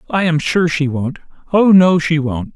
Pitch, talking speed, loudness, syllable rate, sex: 160 Hz, 210 wpm, -14 LUFS, 4.5 syllables/s, male